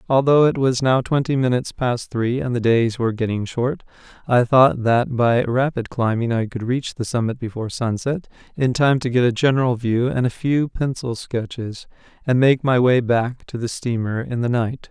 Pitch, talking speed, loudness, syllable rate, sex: 125 Hz, 200 wpm, -20 LUFS, 4.9 syllables/s, male